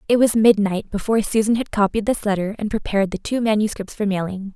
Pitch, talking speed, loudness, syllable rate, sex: 210 Hz, 210 wpm, -20 LUFS, 6.2 syllables/s, female